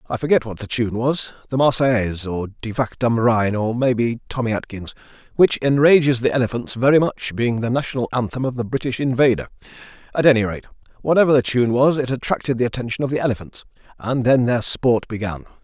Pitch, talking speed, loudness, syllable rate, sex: 120 Hz, 190 wpm, -19 LUFS, 5.9 syllables/s, male